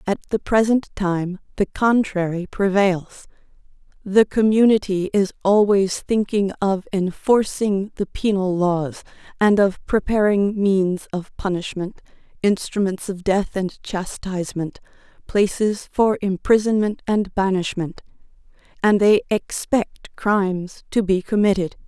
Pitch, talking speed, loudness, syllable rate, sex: 195 Hz, 110 wpm, -20 LUFS, 4.0 syllables/s, female